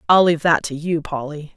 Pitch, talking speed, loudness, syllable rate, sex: 160 Hz, 230 wpm, -19 LUFS, 5.8 syllables/s, female